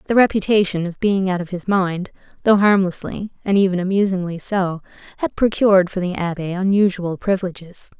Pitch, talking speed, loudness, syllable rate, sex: 190 Hz, 160 wpm, -19 LUFS, 5.5 syllables/s, female